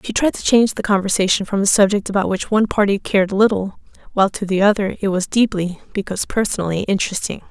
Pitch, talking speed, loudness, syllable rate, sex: 200 Hz, 200 wpm, -18 LUFS, 6.7 syllables/s, female